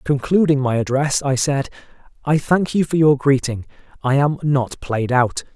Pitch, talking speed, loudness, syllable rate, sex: 140 Hz, 175 wpm, -18 LUFS, 4.5 syllables/s, male